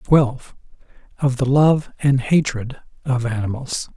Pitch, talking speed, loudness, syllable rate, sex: 130 Hz, 120 wpm, -19 LUFS, 4.2 syllables/s, male